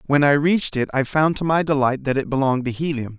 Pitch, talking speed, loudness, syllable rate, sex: 140 Hz, 265 wpm, -20 LUFS, 6.3 syllables/s, male